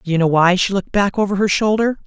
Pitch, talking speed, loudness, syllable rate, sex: 195 Hz, 260 wpm, -16 LUFS, 6.2 syllables/s, male